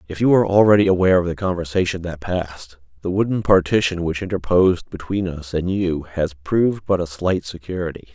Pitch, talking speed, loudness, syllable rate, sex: 90 Hz, 185 wpm, -19 LUFS, 5.8 syllables/s, male